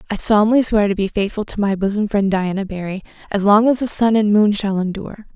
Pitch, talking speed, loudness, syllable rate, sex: 205 Hz, 235 wpm, -17 LUFS, 6.0 syllables/s, female